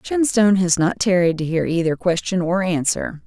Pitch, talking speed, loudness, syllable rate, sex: 180 Hz, 185 wpm, -19 LUFS, 5.1 syllables/s, female